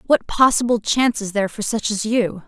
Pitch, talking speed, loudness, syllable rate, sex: 220 Hz, 220 wpm, -19 LUFS, 5.6 syllables/s, female